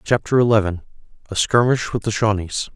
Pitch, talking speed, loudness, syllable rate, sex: 110 Hz, 130 wpm, -19 LUFS, 5.7 syllables/s, male